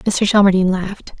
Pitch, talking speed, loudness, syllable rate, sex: 195 Hz, 150 wpm, -15 LUFS, 6.2 syllables/s, female